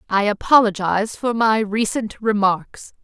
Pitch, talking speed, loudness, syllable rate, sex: 215 Hz, 120 wpm, -19 LUFS, 4.3 syllables/s, female